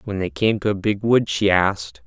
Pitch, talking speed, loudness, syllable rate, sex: 100 Hz, 260 wpm, -20 LUFS, 5.1 syllables/s, male